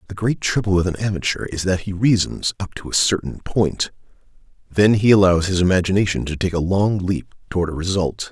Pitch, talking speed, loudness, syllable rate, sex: 95 Hz, 200 wpm, -19 LUFS, 5.6 syllables/s, male